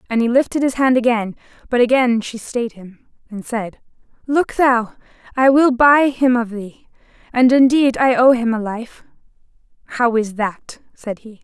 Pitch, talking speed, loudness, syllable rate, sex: 240 Hz, 175 wpm, -16 LUFS, 4.5 syllables/s, female